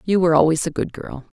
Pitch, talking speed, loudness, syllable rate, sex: 165 Hz, 260 wpm, -19 LUFS, 6.8 syllables/s, female